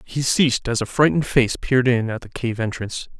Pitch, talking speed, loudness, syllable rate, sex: 120 Hz, 225 wpm, -20 LUFS, 6.0 syllables/s, male